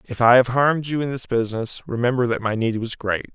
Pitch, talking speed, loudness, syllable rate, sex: 120 Hz, 250 wpm, -21 LUFS, 6.3 syllables/s, male